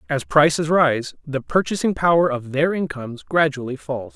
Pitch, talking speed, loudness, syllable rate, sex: 145 Hz, 160 wpm, -20 LUFS, 4.9 syllables/s, male